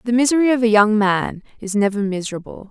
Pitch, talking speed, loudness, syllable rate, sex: 215 Hz, 200 wpm, -17 LUFS, 6.2 syllables/s, female